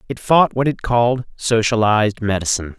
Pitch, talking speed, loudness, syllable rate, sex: 115 Hz, 150 wpm, -17 LUFS, 5.6 syllables/s, male